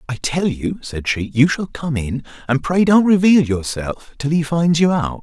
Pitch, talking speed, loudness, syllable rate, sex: 145 Hz, 220 wpm, -18 LUFS, 4.4 syllables/s, male